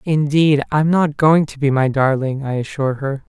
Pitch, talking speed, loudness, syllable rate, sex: 145 Hz, 215 wpm, -17 LUFS, 5.2 syllables/s, male